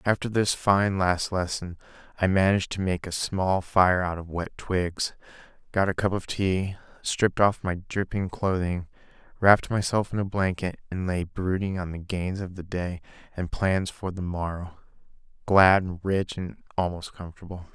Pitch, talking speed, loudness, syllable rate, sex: 95 Hz, 170 wpm, -26 LUFS, 4.6 syllables/s, male